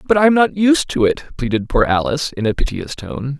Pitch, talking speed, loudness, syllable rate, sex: 150 Hz, 230 wpm, -17 LUFS, 5.4 syllables/s, male